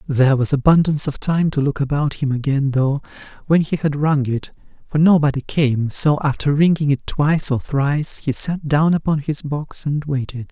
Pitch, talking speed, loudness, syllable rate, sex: 145 Hz, 195 wpm, -18 LUFS, 5.1 syllables/s, male